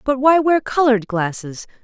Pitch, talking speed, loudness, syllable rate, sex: 250 Hz, 165 wpm, -17 LUFS, 5.0 syllables/s, female